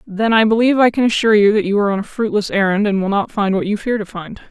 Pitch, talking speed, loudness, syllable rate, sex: 210 Hz, 305 wpm, -16 LUFS, 7.0 syllables/s, female